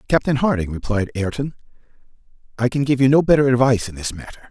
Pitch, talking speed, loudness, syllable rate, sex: 125 Hz, 185 wpm, -19 LUFS, 6.7 syllables/s, male